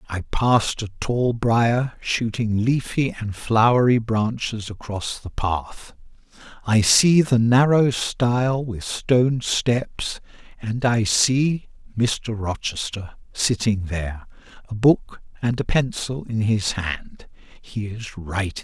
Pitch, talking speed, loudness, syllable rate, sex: 115 Hz, 120 wpm, -21 LUFS, 3.4 syllables/s, male